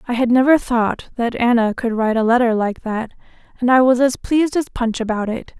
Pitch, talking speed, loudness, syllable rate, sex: 240 Hz, 225 wpm, -17 LUFS, 5.6 syllables/s, female